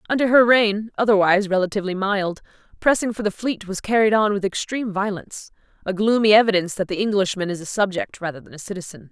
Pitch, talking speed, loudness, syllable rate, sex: 200 Hz, 185 wpm, -20 LUFS, 6.5 syllables/s, female